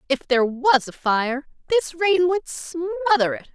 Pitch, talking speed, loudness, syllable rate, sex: 300 Hz, 170 wpm, -21 LUFS, 4.7 syllables/s, female